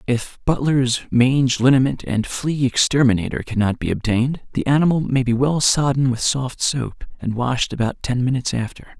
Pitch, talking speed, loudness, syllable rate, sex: 130 Hz, 165 wpm, -19 LUFS, 5.1 syllables/s, male